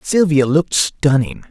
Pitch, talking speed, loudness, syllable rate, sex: 150 Hz, 120 wpm, -15 LUFS, 4.4 syllables/s, male